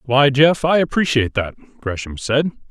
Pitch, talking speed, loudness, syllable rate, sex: 135 Hz, 155 wpm, -17 LUFS, 5.1 syllables/s, male